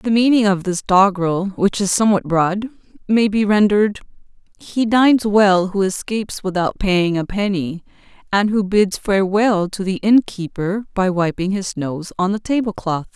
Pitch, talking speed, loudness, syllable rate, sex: 200 Hz, 155 wpm, -17 LUFS, 4.6 syllables/s, female